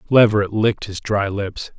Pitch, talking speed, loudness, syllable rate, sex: 105 Hz, 170 wpm, -19 LUFS, 5.1 syllables/s, male